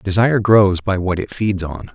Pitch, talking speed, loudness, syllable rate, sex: 100 Hz, 215 wpm, -16 LUFS, 4.9 syllables/s, male